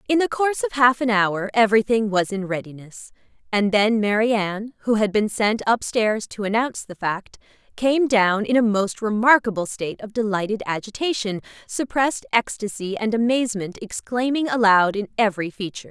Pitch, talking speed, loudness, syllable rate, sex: 220 Hz, 170 wpm, -21 LUFS, 5.4 syllables/s, female